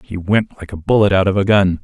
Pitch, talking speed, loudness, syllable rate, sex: 95 Hz, 295 wpm, -15 LUFS, 5.8 syllables/s, male